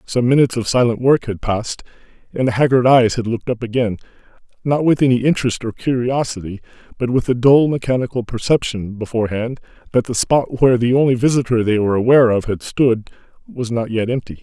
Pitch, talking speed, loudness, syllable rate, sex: 120 Hz, 185 wpm, -17 LUFS, 6.2 syllables/s, male